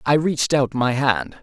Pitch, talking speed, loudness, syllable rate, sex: 130 Hz, 210 wpm, -20 LUFS, 4.6 syllables/s, male